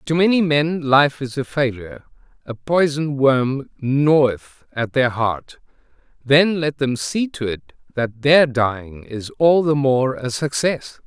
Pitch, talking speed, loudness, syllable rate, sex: 135 Hz, 155 wpm, -18 LUFS, 3.9 syllables/s, male